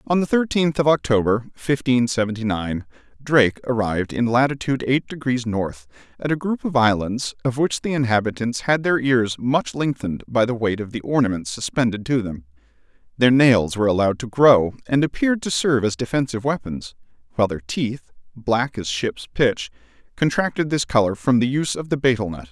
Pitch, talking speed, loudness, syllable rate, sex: 125 Hz, 180 wpm, -21 LUFS, 5.5 syllables/s, male